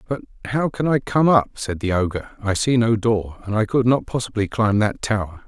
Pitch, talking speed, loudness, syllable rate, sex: 110 Hz, 230 wpm, -20 LUFS, 5.2 syllables/s, male